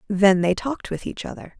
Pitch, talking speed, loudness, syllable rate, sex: 200 Hz, 225 wpm, -22 LUFS, 5.8 syllables/s, female